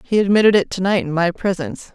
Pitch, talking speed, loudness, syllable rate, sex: 190 Hz, 215 wpm, -17 LUFS, 6.5 syllables/s, female